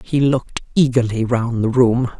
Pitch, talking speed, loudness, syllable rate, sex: 120 Hz, 165 wpm, -17 LUFS, 4.6 syllables/s, female